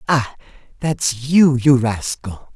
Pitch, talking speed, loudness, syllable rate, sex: 130 Hz, 115 wpm, -17 LUFS, 3.2 syllables/s, male